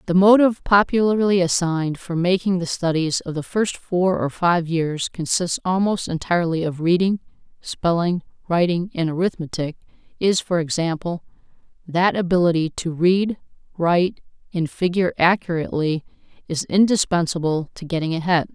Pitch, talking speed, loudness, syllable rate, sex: 175 Hz, 130 wpm, -20 LUFS, 5.1 syllables/s, female